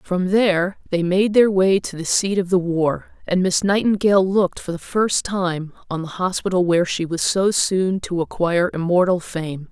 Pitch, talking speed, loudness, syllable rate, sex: 185 Hz, 200 wpm, -19 LUFS, 4.8 syllables/s, female